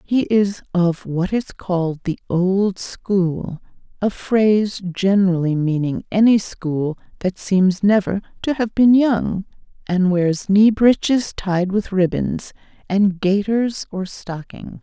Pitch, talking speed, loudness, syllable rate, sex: 195 Hz, 125 wpm, -19 LUFS, 3.5 syllables/s, female